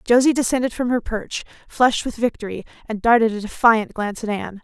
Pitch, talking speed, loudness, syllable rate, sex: 230 Hz, 195 wpm, -20 LUFS, 6.1 syllables/s, female